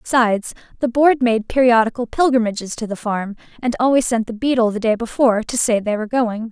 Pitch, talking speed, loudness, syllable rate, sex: 230 Hz, 205 wpm, -18 LUFS, 5.9 syllables/s, female